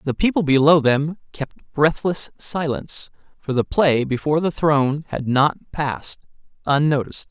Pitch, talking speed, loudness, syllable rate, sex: 150 Hz, 140 wpm, -20 LUFS, 4.8 syllables/s, male